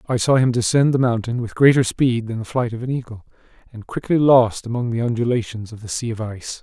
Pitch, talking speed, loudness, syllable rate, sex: 120 Hz, 235 wpm, -19 LUFS, 6.0 syllables/s, male